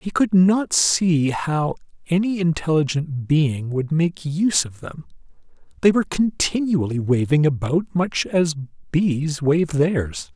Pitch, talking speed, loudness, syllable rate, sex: 160 Hz, 135 wpm, -20 LUFS, 3.7 syllables/s, male